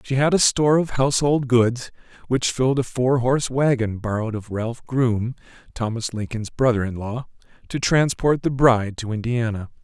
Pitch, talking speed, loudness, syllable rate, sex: 125 Hz, 170 wpm, -21 LUFS, 5.2 syllables/s, male